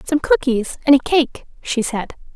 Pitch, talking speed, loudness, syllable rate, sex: 270 Hz, 180 wpm, -18 LUFS, 4.4 syllables/s, female